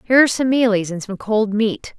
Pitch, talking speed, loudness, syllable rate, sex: 220 Hz, 240 wpm, -18 LUFS, 5.8 syllables/s, female